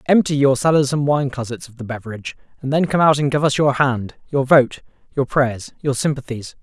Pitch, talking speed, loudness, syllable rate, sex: 135 Hz, 215 wpm, -18 LUFS, 5.5 syllables/s, male